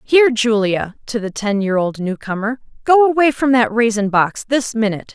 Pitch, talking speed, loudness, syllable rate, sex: 225 Hz, 165 wpm, -17 LUFS, 5.2 syllables/s, female